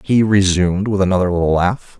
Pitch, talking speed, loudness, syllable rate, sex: 95 Hz, 180 wpm, -15 LUFS, 5.8 syllables/s, male